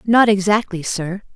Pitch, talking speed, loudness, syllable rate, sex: 200 Hz, 135 wpm, -18 LUFS, 4.3 syllables/s, female